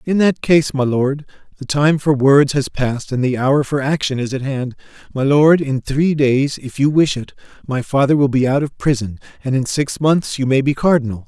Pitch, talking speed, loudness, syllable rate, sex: 140 Hz, 230 wpm, -16 LUFS, 5.0 syllables/s, male